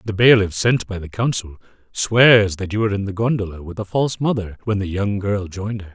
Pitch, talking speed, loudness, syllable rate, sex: 100 Hz, 230 wpm, -19 LUFS, 5.8 syllables/s, male